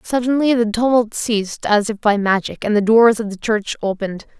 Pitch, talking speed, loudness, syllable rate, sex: 220 Hz, 205 wpm, -17 LUFS, 5.3 syllables/s, female